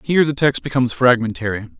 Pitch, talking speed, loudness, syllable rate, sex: 130 Hz, 165 wpm, -17 LUFS, 6.7 syllables/s, male